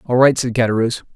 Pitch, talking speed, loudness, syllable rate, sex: 120 Hz, 205 wpm, -16 LUFS, 7.5 syllables/s, male